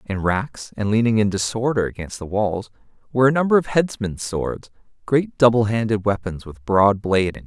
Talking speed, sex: 200 wpm, male